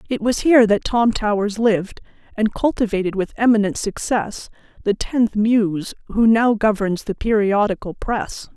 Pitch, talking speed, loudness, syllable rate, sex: 215 Hz, 145 wpm, -19 LUFS, 4.6 syllables/s, female